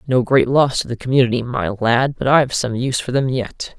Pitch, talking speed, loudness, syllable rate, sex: 130 Hz, 220 wpm, -17 LUFS, 5.6 syllables/s, female